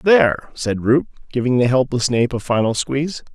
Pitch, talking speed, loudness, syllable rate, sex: 125 Hz, 180 wpm, -18 LUFS, 5.5 syllables/s, male